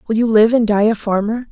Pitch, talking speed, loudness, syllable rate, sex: 220 Hz, 275 wpm, -15 LUFS, 6.1 syllables/s, female